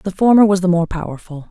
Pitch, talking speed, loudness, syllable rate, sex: 180 Hz, 240 wpm, -14 LUFS, 6.1 syllables/s, female